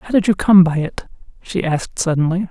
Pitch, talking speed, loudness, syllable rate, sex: 175 Hz, 215 wpm, -16 LUFS, 6.0 syllables/s, female